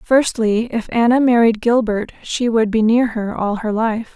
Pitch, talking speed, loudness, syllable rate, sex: 225 Hz, 190 wpm, -17 LUFS, 4.3 syllables/s, female